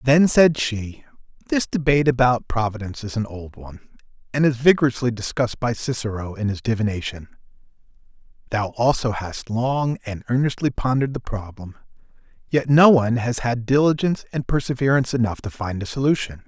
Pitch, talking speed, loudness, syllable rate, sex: 120 Hz, 155 wpm, -21 LUFS, 5.8 syllables/s, male